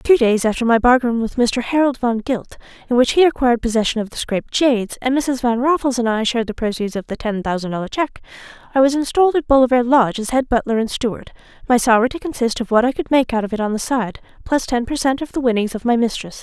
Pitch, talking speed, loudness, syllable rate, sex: 240 Hz, 255 wpm, -18 LUFS, 6.5 syllables/s, female